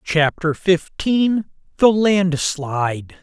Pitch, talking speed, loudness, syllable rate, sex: 175 Hz, 55 wpm, -18 LUFS, 2.9 syllables/s, male